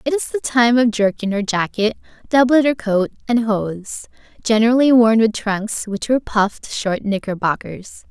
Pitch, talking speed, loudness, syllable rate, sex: 225 Hz, 155 wpm, -17 LUFS, 4.7 syllables/s, female